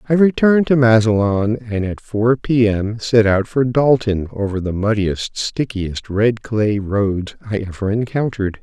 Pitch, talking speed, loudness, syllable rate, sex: 110 Hz, 160 wpm, -17 LUFS, 4.3 syllables/s, male